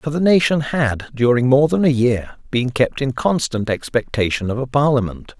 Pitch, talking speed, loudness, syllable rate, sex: 130 Hz, 190 wpm, -18 LUFS, 4.9 syllables/s, male